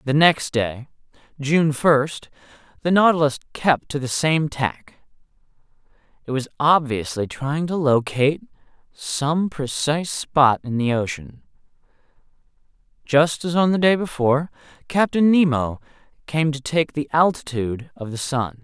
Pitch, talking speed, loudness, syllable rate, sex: 145 Hz, 130 wpm, -20 LUFS, 4.3 syllables/s, male